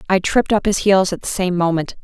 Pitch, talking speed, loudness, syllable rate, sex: 190 Hz, 265 wpm, -17 LUFS, 6.0 syllables/s, female